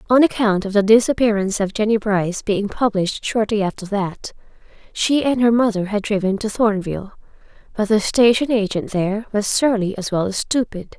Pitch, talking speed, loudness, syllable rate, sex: 210 Hz, 175 wpm, -19 LUFS, 5.5 syllables/s, female